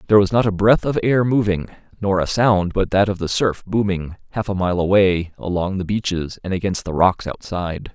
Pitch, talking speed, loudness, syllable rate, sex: 95 Hz, 220 wpm, -19 LUFS, 5.3 syllables/s, male